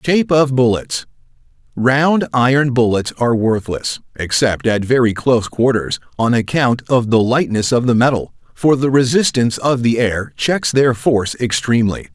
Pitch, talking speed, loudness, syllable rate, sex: 125 Hz, 150 wpm, -15 LUFS, 4.8 syllables/s, male